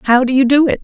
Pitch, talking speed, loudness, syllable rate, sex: 260 Hz, 360 wpm, -12 LUFS, 6.3 syllables/s, female